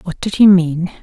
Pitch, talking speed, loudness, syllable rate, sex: 180 Hz, 235 wpm, -12 LUFS, 4.6 syllables/s, female